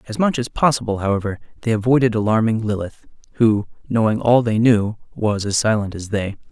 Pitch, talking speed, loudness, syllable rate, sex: 110 Hz, 175 wpm, -19 LUFS, 5.6 syllables/s, male